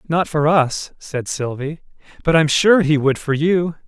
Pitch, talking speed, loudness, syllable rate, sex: 155 Hz, 185 wpm, -18 LUFS, 4.1 syllables/s, male